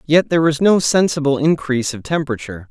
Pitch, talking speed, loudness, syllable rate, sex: 145 Hz, 175 wpm, -17 LUFS, 6.6 syllables/s, male